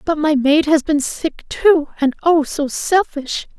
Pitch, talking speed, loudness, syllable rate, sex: 305 Hz, 185 wpm, -17 LUFS, 3.8 syllables/s, female